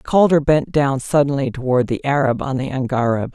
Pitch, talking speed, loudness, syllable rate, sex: 135 Hz, 180 wpm, -18 LUFS, 5.1 syllables/s, female